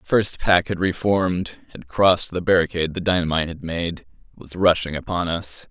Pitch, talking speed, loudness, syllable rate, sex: 90 Hz, 180 wpm, -21 LUFS, 5.3 syllables/s, male